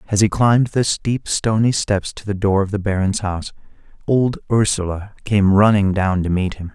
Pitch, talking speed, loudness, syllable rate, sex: 100 Hz, 195 wpm, -18 LUFS, 4.9 syllables/s, male